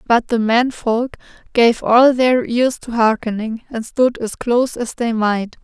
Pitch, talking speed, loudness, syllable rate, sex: 235 Hz, 180 wpm, -17 LUFS, 4.0 syllables/s, female